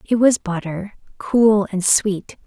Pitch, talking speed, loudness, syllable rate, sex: 200 Hz, 145 wpm, -18 LUFS, 3.4 syllables/s, female